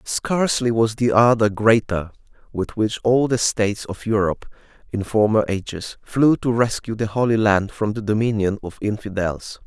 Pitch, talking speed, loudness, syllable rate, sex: 110 Hz, 160 wpm, -20 LUFS, 4.8 syllables/s, male